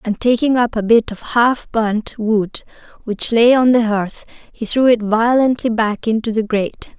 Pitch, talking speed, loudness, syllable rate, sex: 225 Hz, 190 wpm, -16 LUFS, 4.3 syllables/s, female